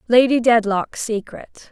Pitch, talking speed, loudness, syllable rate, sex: 230 Hz, 105 wpm, -18 LUFS, 3.9 syllables/s, female